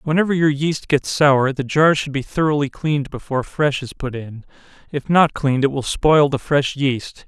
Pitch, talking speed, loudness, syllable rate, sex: 140 Hz, 200 wpm, -18 LUFS, 4.9 syllables/s, male